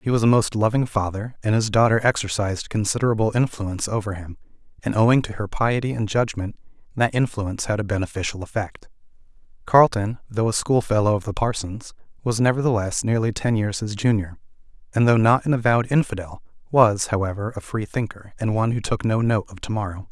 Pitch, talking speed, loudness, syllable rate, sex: 110 Hz, 180 wpm, -22 LUFS, 5.9 syllables/s, male